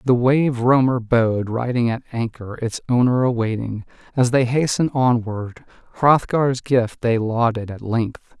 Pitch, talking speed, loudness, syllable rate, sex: 120 Hz, 145 wpm, -20 LUFS, 4.2 syllables/s, male